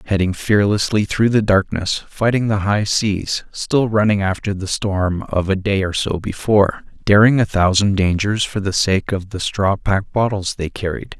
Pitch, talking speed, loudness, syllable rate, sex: 100 Hz, 180 wpm, -18 LUFS, 4.6 syllables/s, male